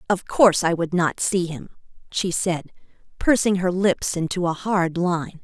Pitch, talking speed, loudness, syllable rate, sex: 180 Hz, 175 wpm, -21 LUFS, 4.4 syllables/s, female